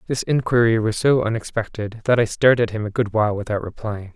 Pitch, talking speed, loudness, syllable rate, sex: 110 Hz, 215 wpm, -20 LUFS, 6.1 syllables/s, male